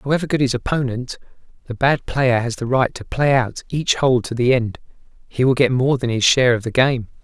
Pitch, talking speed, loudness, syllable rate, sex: 125 Hz, 230 wpm, -18 LUFS, 5.5 syllables/s, male